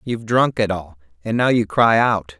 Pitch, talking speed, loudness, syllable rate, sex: 105 Hz, 225 wpm, -18 LUFS, 4.9 syllables/s, male